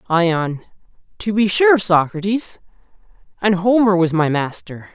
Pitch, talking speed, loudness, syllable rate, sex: 185 Hz, 120 wpm, -17 LUFS, 4.1 syllables/s, male